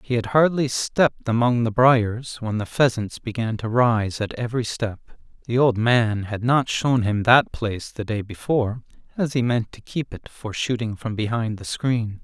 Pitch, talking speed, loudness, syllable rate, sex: 115 Hz, 195 wpm, -22 LUFS, 2.2 syllables/s, male